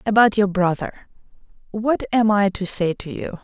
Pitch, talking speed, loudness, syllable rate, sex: 205 Hz, 175 wpm, -20 LUFS, 4.5 syllables/s, female